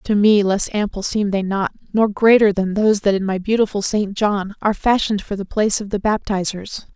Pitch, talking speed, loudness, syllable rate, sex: 205 Hz, 215 wpm, -18 LUFS, 5.7 syllables/s, female